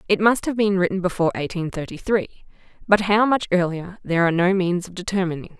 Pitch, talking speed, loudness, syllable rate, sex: 185 Hz, 205 wpm, -21 LUFS, 6.2 syllables/s, female